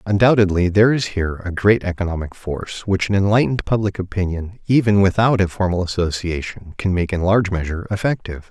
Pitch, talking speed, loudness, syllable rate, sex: 95 Hz, 170 wpm, -19 LUFS, 6.2 syllables/s, male